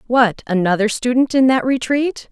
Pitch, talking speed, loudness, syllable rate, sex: 245 Hz, 130 wpm, -16 LUFS, 4.8 syllables/s, female